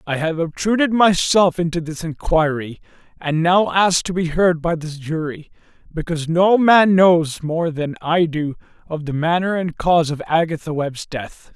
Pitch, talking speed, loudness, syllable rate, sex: 165 Hz, 170 wpm, -18 LUFS, 4.5 syllables/s, male